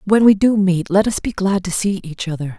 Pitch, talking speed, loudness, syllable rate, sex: 190 Hz, 280 wpm, -17 LUFS, 5.3 syllables/s, female